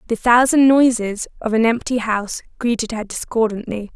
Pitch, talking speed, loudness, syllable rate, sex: 230 Hz, 150 wpm, -18 LUFS, 5.2 syllables/s, female